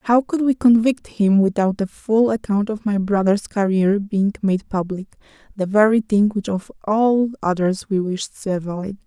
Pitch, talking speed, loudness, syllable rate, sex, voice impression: 205 Hz, 170 wpm, -19 LUFS, 4.5 syllables/s, female, feminine, adult-like, slightly relaxed, slightly weak, soft, slightly muffled, slightly raspy, slightly refreshing, calm, friendly, reassuring, kind, modest